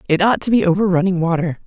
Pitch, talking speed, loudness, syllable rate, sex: 185 Hz, 250 wpm, -16 LUFS, 6.9 syllables/s, female